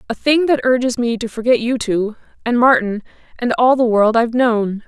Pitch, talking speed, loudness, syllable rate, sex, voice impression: 235 Hz, 185 wpm, -16 LUFS, 5.2 syllables/s, female, feminine, adult-like, slightly intellectual, slightly sharp